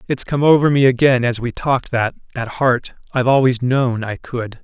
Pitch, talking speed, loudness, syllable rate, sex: 125 Hz, 205 wpm, -17 LUFS, 5.2 syllables/s, male